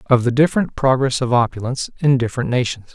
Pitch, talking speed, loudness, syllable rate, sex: 130 Hz, 185 wpm, -18 LUFS, 6.7 syllables/s, male